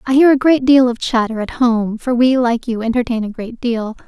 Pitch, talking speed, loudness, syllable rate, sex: 240 Hz, 250 wpm, -15 LUFS, 5.2 syllables/s, female